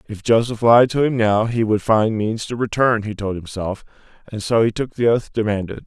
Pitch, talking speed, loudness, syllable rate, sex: 110 Hz, 225 wpm, -18 LUFS, 5.1 syllables/s, male